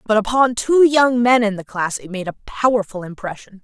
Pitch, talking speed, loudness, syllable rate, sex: 220 Hz, 215 wpm, -17 LUFS, 5.3 syllables/s, female